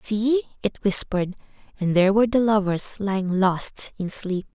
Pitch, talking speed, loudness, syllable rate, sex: 200 Hz, 160 wpm, -22 LUFS, 4.9 syllables/s, female